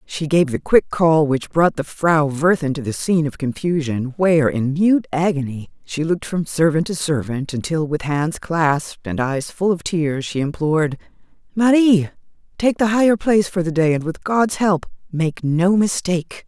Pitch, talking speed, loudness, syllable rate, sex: 165 Hz, 185 wpm, -19 LUFS, 4.8 syllables/s, female